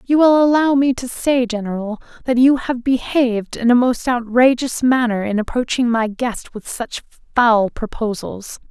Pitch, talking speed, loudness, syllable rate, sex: 240 Hz, 165 wpm, -17 LUFS, 4.6 syllables/s, female